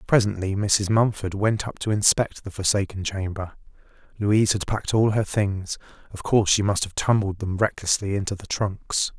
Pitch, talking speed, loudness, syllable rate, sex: 100 Hz, 175 wpm, -23 LUFS, 5.1 syllables/s, male